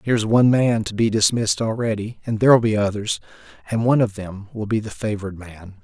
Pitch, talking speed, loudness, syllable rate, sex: 110 Hz, 205 wpm, -20 LUFS, 6.0 syllables/s, male